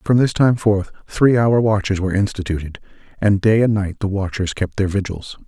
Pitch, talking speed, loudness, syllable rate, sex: 100 Hz, 195 wpm, -18 LUFS, 5.3 syllables/s, male